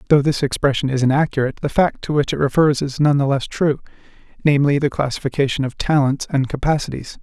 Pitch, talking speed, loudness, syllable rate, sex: 140 Hz, 190 wpm, -18 LUFS, 6.4 syllables/s, male